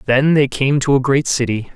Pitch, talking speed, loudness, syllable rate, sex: 135 Hz, 240 wpm, -16 LUFS, 5.1 syllables/s, male